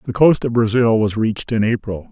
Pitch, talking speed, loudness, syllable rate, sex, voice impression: 115 Hz, 225 wpm, -17 LUFS, 5.6 syllables/s, male, masculine, adult-like, thick, slightly relaxed, powerful, soft, slightly muffled, cool, intellectual, mature, friendly, reassuring, wild, lively, slightly kind, slightly modest